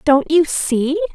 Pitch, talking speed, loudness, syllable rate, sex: 315 Hz, 155 wpm, -16 LUFS, 3.3 syllables/s, female